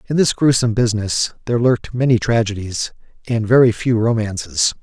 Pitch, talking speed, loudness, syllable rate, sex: 115 Hz, 150 wpm, -17 LUFS, 5.8 syllables/s, male